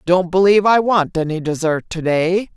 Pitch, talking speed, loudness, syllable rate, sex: 180 Hz, 165 wpm, -16 LUFS, 5.0 syllables/s, female